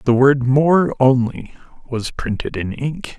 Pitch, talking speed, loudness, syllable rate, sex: 130 Hz, 150 wpm, -18 LUFS, 3.6 syllables/s, male